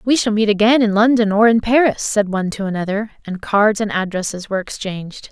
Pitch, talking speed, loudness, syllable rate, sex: 210 Hz, 215 wpm, -17 LUFS, 5.9 syllables/s, female